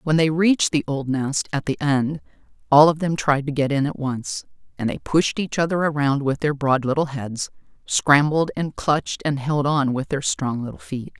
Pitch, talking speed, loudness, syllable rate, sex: 140 Hz, 215 wpm, -21 LUFS, 4.8 syllables/s, female